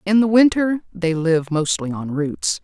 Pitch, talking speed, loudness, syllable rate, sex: 175 Hz, 185 wpm, -19 LUFS, 4.2 syllables/s, female